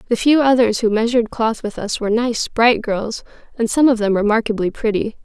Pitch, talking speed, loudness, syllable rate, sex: 225 Hz, 205 wpm, -17 LUFS, 5.6 syllables/s, female